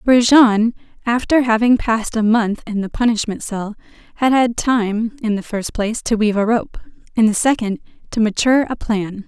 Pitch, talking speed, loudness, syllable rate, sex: 225 Hz, 180 wpm, -17 LUFS, 5.1 syllables/s, female